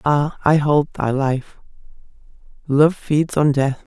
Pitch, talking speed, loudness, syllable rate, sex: 145 Hz, 120 wpm, -18 LUFS, 3.0 syllables/s, female